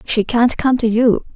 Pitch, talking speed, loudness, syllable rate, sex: 235 Hz, 220 wpm, -15 LUFS, 4.2 syllables/s, female